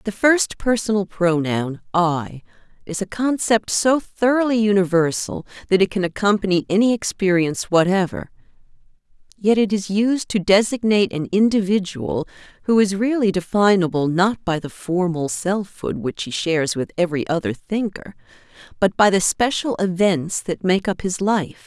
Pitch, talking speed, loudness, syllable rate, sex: 195 Hz, 145 wpm, -19 LUFS, 4.8 syllables/s, female